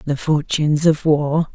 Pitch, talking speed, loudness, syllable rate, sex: 150 Hz, 155 wpm, -17 LUFS, 4.4 syllables/s, female